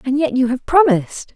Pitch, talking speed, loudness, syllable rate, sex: 270 Hz, 220 wpm, -16 LUFS, 5.7 syllables/s, female